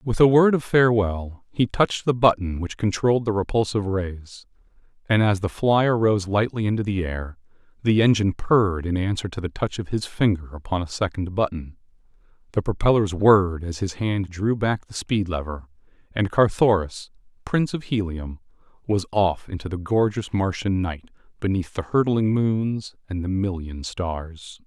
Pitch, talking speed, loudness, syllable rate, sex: 100 Hz, 170 wpm, -23 LUFS, 4.9 syllables/s, male